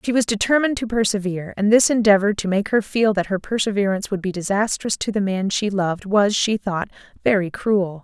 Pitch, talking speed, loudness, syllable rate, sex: 205 Hz, 210 wpm, -20 LUFS, 5.8 syllables/s, female